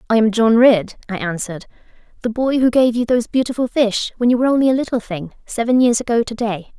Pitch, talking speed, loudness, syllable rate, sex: 230 Hz, 230 wpm, -17 LUFS, 6.3 syllables/s, female